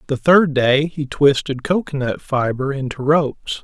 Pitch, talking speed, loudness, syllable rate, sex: 140 Hz, 150 wpm, -18 LUFS, 4.4 syllables/s, male